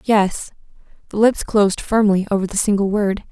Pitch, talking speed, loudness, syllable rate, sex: 205 Hz, 165 wpm, -18 LUFS, 5.1 syllables/s, female